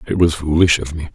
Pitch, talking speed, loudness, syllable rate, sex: 80 Hz, 260 wpm, -16 LUFS, 6.3 syllables/s, male